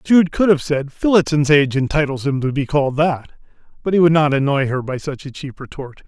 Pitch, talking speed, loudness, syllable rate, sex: 145 Hz, 225 wpm, -17 LUFS, 5.7 syllables/s, male